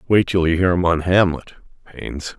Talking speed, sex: 200 wpm, male